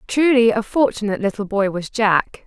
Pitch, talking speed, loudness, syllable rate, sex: 220 Hz, 170 wpm, -18 LUFS, 5.2 syllables/s, female